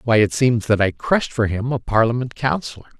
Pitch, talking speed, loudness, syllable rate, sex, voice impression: 115 Hz, 220 wpm, -19 LUFS, 5.7 syllables/s, male, very masculine, very adult-like, very middle-aged, very thick, tensed, powerful, bright, soft, slightly muffled, fluent, very cool, very intellectual, sincere, very calm, very mature, very friendly, very reassuring, unique, slightly elegant, wild, sweet, slightly lively, very kind, slightly modest